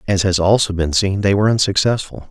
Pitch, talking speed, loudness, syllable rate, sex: 95 Hz, 210 wpm, -16 LUFS, 6.1 syllables/s, male